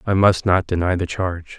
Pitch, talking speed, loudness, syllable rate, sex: 90 Hz, 230 wpm, -19 LUFS, 5.4 syllables/s, male